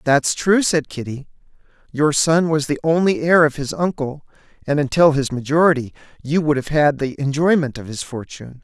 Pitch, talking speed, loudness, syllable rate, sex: 145 Hz, 180 wpm, -18 LUFS, 5.2 syllables/s, male